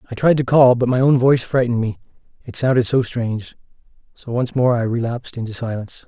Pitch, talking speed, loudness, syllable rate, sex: 120 Hz, 200 wpm, -18 LUFS, 6.4 syllables/s, male